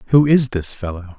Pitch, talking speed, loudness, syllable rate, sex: 110 Hz, 205 wpm, -17 LUFS, 5.3 syllables/s, male